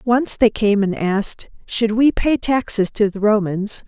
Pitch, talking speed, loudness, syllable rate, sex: 215 Hz, 185 wpm, -18 LUFS, 4.1 syllables/s, female